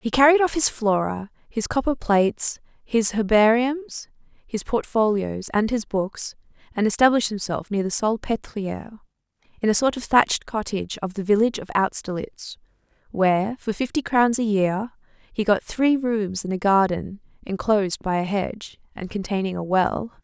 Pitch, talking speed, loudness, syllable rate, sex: 215 Hz, 155 wpm, -22 LUFS, 4.9 syllables/s, female